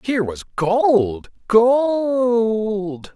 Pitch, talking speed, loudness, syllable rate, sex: 215 Hz, 75 wpm, -18 LUFS, 1.8 syllables/s, male